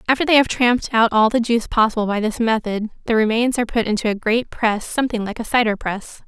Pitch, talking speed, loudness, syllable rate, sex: 225 Hz, 240 wpm, -18 LUFS, 6.3 syllables/s, female